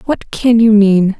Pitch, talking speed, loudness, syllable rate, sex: 215 Hz, 200 wpm, -11 LUFS, 3.8 syllables/s, female